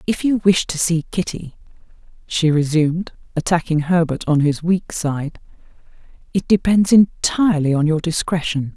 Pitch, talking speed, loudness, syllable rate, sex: 165 Hz, 135 wpm, -18 LUFS, 4.8 syllables/s, female